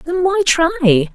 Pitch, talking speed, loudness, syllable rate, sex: 315 Hz, 155 wpm, -14 LUFS, 5.0 syllables/s, female